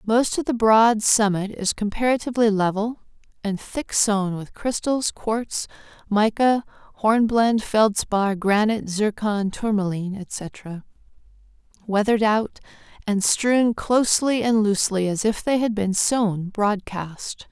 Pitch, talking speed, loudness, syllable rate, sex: 215 Hz, 120 wpm, -21 LUFS, 4.1 syllables/s, female